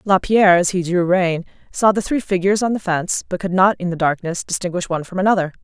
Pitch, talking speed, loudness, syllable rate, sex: 185 Hz, 235 wpm, -18 LUFS, 6.5 syllables/s, female